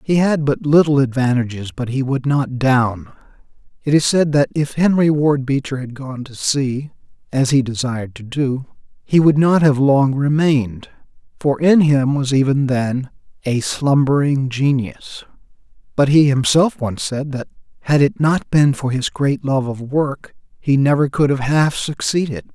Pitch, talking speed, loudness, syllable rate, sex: 140 Hz, 170 wpm, -17 LUFS, 4.5 syllables/s, male